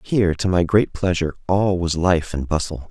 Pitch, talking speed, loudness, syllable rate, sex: 90 Hz, 205 wpm, -20 LUFS, 5.2 syllables/s, male